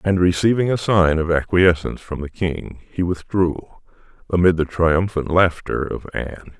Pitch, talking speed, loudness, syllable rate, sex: 85 Hz, 155 wpm, -19 LUFS, 4.9 syllables/s, male